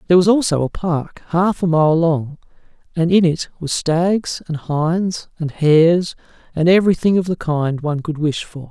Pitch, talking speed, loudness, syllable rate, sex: 165 Hz, 185 wpm, -17 LUFS, 4.8 syllables/s, male